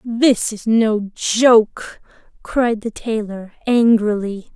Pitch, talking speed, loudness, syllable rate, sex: 220 Hz, 105 wpm, -17 LUFS, 2.9 syllables/s, female